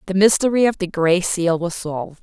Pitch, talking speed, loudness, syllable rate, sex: 185 Hz, 215 wpm, -18 LUFS, 5.3 syllables/s, female